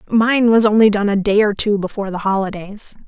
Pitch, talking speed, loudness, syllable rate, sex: 205 Hz, 215 wpm, -16 LUFS, 5.7 syllables/s, female